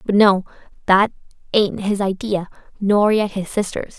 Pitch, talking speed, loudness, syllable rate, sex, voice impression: 200 Hz, 150 wpm, -19 LUFS, 4.4 syllables/s, female, feminine, slightly young, slightly fluent, cute, friendly, slightly kind